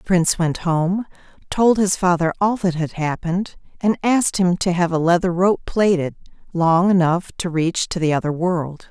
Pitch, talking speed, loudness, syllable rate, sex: 175 Hz, 190 wpm, -19 LUFS, 4.8 syllables/s, female